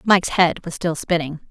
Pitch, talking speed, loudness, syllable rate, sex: 170 Hz, 200 wpm, -20 LUFS, 5.5 syllables/s, female